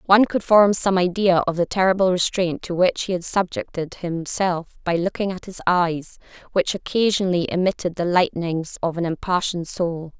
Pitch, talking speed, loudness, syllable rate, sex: 180 Hz, 170 wpm, -21 LUFS, 5.1 syllables/s, female